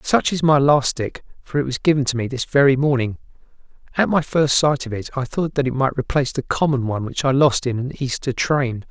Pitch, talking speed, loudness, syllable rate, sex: 135 Hz, 240 wpm, -19 LUFS, 5.7 syllables/s, male